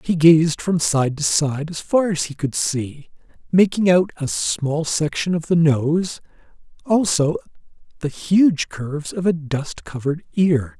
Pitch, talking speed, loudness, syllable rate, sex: 160 Hz, 160 wpm, -19 LUFS, 4.0 syllables/s, male